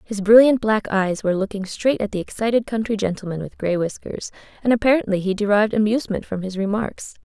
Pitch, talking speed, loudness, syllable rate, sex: 210 Hz, 190 wpm, -20 LUFS, 6.1 syllables/s, female